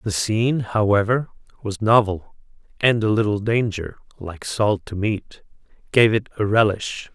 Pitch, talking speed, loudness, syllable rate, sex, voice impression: 105 Hz, 145 wpm, -20 LUFS, 4.4 syllables/s, male, very masculine, adult-like, slightly middle-aged, thick, tensed, powerful, slightly dark, slightly hard, slightly muffled, fluent, slightly raspy, cool, intellectual, refreshing, very sincere, very calm, mature, friendly, reassuring, slightly unique, slightly elegant, wild, sweet, slightly lively, very kind, slightly modest